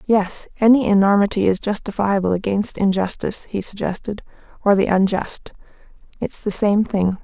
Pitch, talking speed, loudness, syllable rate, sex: 200 Hz, 135 wpm, -19 LUFS, 5.1 syllables/s, female